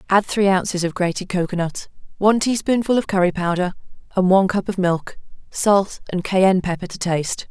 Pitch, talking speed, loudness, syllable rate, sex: 190 Hz, 175 wpm, -19 LUFS, 5.6 syllables/s, female